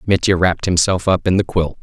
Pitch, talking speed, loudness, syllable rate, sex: 90 Hz, 230 wpm, -16 LUFS, 5.9 syllables/s, male